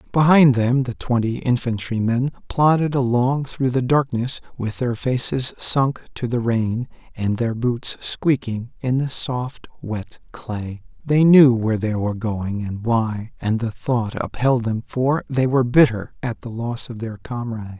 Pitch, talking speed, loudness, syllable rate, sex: 120 Hz, 165 wpm, -20 LUFS, 4.1 syllables/s, male